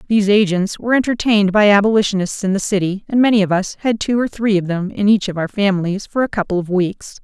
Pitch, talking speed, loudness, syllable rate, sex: 200 Hz, 240 wpm, -16 LUFS, 6.4 syllables/s, female